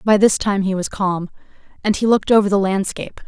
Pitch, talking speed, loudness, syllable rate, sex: 200 Hz, 220 wpm, -18 LUFS, 6.1 syllables/s, female